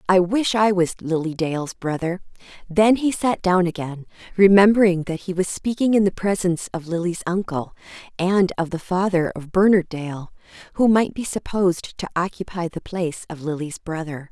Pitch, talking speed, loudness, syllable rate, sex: 180 Hz, 170 wpm, -21 LUFS, 5.0 syllables/s, female